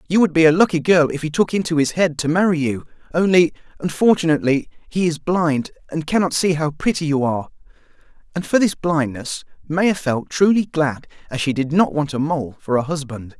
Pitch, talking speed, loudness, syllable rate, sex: 155 Hz, 200 wpm, -19 LUFS, 5.5 syllables/s, male